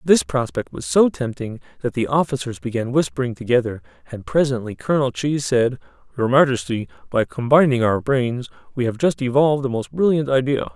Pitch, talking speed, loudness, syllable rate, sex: 125 Hz, 165 wpm, -20 LUFS, 5.6 syllables/s, male